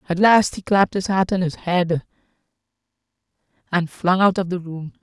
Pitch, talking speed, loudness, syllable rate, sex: 180 Hz, 180 wpm, -19 LUFS, 5.1 syllables/s, female